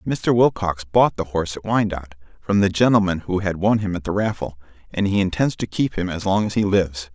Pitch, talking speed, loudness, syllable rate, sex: 95 Hz, 235 wpm, -20 LUFS, 5.7 syllables/s, male